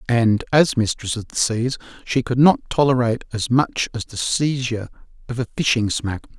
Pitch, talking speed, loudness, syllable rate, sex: 120 Hz, 180 wpm, -20 LUFS, 5.1 syllables/s, male